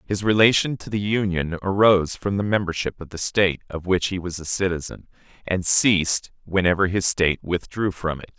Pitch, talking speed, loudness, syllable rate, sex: 95 Hz, 185 wpm, -21 LUFS, 5.4 syllables/s, male